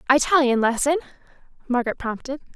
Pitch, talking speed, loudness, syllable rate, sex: 265 Hz, 95 wpm, -21 LUFS, 6.6 syllables/s, female